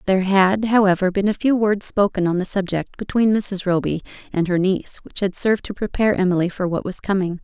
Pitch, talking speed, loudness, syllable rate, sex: 195 Hz, 220 wpm, -20 LUFS, 5.9 syllables/s, female